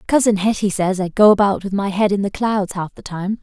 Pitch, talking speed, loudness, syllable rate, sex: 200 Hz, 265 wpm, -18 LUFS, 5.5 syllables/s, female